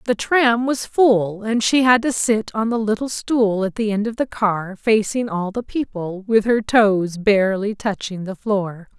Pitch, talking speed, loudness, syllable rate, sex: 215 Hz, 200 wpm, -19 LUFS, 4.1 syllables/s, female